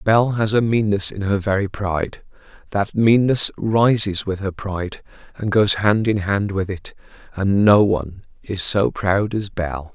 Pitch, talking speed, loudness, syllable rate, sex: 100 Hz, 175 wpm, -19 LUFS, 4.3 syllables/s, male